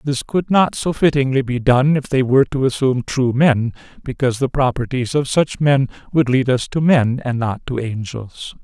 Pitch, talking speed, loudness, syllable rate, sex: 130 Hz, 200 wpm, -17 LUFS, 4.9 syllables/s, male